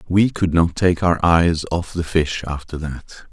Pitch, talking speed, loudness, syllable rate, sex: 85 Hz, 200 wpm, -19 LUFS, 4.1 syllables/s, male